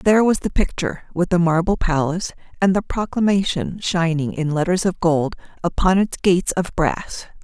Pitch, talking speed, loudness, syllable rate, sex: 180 Hz, 170 wpm, -20 LUFS, 5.3 syllables/s, female